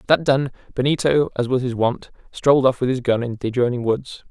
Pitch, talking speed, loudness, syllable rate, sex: 130 Hz, 225 wpm, -20 LUFS, 6.0 syllables/s, male